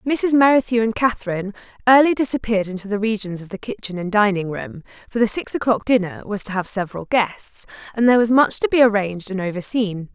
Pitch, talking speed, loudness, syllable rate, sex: 215 Hz, 200 wpm, -19 LUFS, 6.1 syllables/s, female